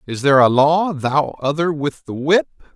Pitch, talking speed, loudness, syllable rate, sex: 145 Hz, 195 wpm, -17 LUFS, 4.8 syllables/s, male